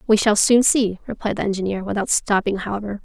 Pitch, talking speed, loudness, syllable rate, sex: 205 Hz, 195 wpm, -19 LUFS, 6.1 syllables/s, female